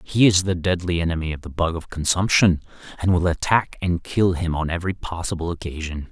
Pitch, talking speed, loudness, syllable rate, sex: 85 Hz, 195 wpm, -22 LUFS, 5.7 syllables/s, male